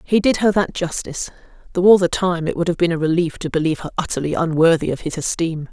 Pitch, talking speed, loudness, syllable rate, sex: 170 Hz, 240 wpm, -19 LUFS, 6.5 syllables/s, female